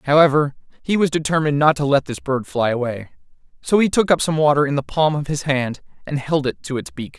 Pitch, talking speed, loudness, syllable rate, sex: 145 Hz, 240 wpm, -19 LUFS, 5.8 syllables/s, male